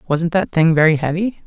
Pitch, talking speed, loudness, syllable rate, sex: 170 Hz, 205 wpm, -16 LUFS, 5.4 syllables/s, female